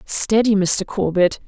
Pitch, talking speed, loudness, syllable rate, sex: 195 Hz, 120 wpm, -17 LUFS, 3.8 syllables/s, female